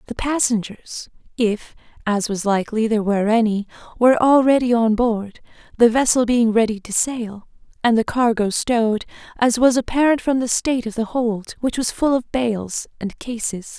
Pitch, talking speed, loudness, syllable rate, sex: 230 Hz, 170 wpm, -19 LUFS, 5.0 syllables/s, female